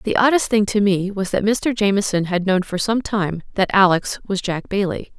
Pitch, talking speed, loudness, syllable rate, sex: 195 Hz, 220 wpm, -19 LUFS, 4.9 syllables/s, female